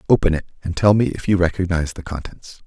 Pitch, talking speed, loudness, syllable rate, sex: 90 Hz, 225 wpm, -20 LUFS, 6.7 syllables/s, male